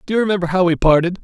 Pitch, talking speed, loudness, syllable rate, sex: 180 Hz, 290 wpm, -16 LUFS, 8.3 syllables/s, male